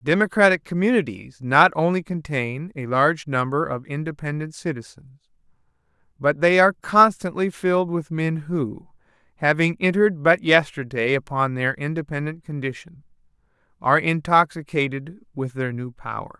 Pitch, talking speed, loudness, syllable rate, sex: 155 Hz, 120 wpm, -21 LUFS, 5.1 syllables/s, male